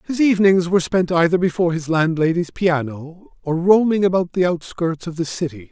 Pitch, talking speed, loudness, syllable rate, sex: 170 Hz, 180 wpm, -18 LUFS, 5.5 syllables/s, male